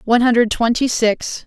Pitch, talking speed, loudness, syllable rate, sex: 235 Hz, 165 wpm, -16 LUFS, 5.2 syllables/s, female